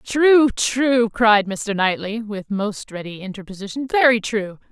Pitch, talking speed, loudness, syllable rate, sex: 215 Hz, 140 wpm, -18 LUFS, 4.0 syllables/s, female